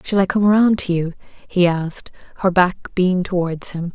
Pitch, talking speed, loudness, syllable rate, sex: 180 Hz, 200 wpm, -18 LUFS, 4.4 syllables/s, female